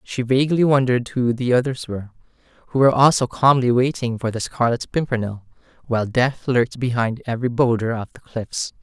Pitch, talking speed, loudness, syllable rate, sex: 125 Hz, 170 wpm, -20 LUFS, 5.8 syllables/s, male